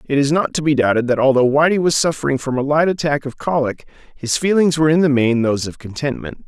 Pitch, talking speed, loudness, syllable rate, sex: 145 Hz, 240 wpm, -17 LUFS, 6.3 syllables/s, male